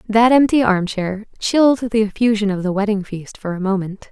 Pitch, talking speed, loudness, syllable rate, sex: 210 Hz, 205 wpm, -17 LUFS, 5.2 syllables/s, female